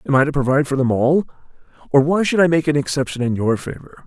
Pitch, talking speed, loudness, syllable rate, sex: 145 Hz, 250 wpm, -18 LUFS, 7.0 syllables/s, male